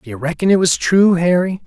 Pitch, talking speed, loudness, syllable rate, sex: 170 Hz, 255 wpm, -15 LUFS, 5.6 syllables/s, male